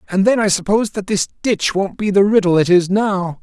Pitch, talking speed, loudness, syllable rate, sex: 190 Hz, 245 wpm, -16 LUFS, 5.6 syllables/s, male